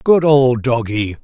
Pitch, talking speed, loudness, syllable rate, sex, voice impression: 125 Hz, 145 wpm, -14 LUFS, 3.7 syllables/s, male, masculine, middle-aged, tensed, powerful, slightly hard, clear, slightly halting, slightly raspy, intellectual, mature, slightly friendly, slightly unique, wild, lively, strict